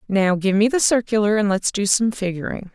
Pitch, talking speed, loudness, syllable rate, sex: 210 Hz, 220 wpm, -19 LUFS, 5.4 syllables/s, female